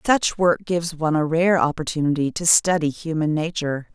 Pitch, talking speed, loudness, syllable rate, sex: 160 Hz, 165 wpm, -20 LUFS, 5.5 syllables/s, female